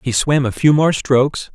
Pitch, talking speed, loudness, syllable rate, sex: 140 Hz, 235 wpm, -15 LUFS, 4.8 syllables/s, male